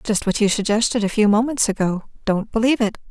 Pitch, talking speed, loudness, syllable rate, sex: 215 Hz, 195 wpm, -19 LUFS, 6.4 syllables/s, female